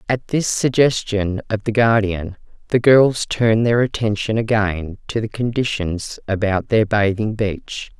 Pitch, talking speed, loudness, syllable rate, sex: 110 Hz, 145 wpm, -18 LUFS, 4.2 syllables/s, female